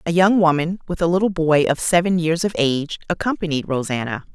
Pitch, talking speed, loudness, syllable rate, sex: 165 Hz, 205 wpm, -19 LUFS, 5.8 syllables/s, female